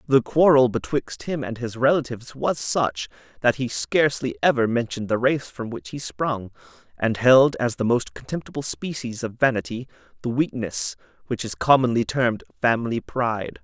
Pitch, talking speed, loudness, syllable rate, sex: 120 Hz, 165 wpm, -23 LUFS, 5.1 syllables/s, male